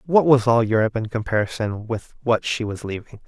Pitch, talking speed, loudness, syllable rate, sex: 115 Hz, 200 wpm, -21 LUFS, 5.7 syllables/s, male